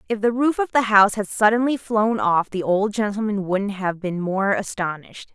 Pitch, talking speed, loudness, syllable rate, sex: 205 Hz, 200 wpm, -21 LUFS, 5.1 syllables/s, female